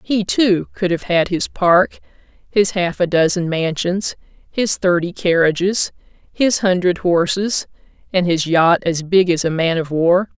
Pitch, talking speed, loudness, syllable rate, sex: 180 Hz, 160 wpm, -17 LUFS, 4.1 syllables/s, female